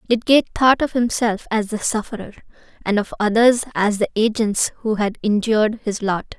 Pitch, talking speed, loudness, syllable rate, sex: 220 Hz, 170 wpm, -19 LUFS, 5.2 syllables/s, female